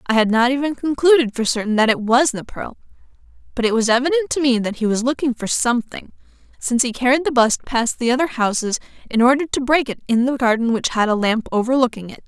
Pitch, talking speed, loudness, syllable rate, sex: 245 Hz, 230 wpm, -18 LUFS, 6.2 syllables/s, female